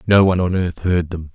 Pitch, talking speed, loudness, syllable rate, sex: 90 Hz, 265 wpm, -18 LUFS, 5.8 syllables/s, male